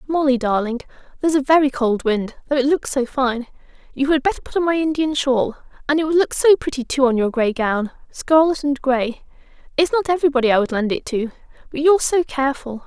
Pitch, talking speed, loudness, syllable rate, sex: 275 Hz, 210 wpm, -19 LUFS, 6.0 syllables/s, female